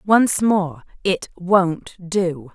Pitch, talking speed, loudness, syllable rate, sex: 185 Hz, 120 wpm, -20 LUFS, 2.4 syllables/s, female